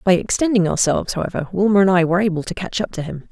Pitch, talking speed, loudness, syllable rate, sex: 185 Hz, 255 wpm, -18 LUFS, 7.2 syllables/s, female